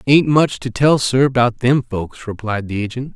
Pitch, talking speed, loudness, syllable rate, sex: 125 Hz, 210 wpm, -17 LUFS, 4.3 syllables/s, male